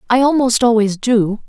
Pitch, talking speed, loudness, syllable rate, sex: 235 Hz, 160 wpm, -14 LUFS, 4.8 syllables/s, female